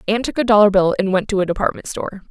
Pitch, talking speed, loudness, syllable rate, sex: 200 Hz, 285 wpm, -17 LUFS, 7.1 syllables/s, female